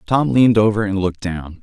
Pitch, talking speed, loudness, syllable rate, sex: 105 Hz, 220 wpm, -17 LUFS, 6.0 syllables/s, male